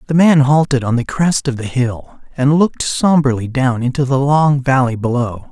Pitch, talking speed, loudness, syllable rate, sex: 135 Hz, 195 wpm, -15 LUFS, 4.8 syllables/s, male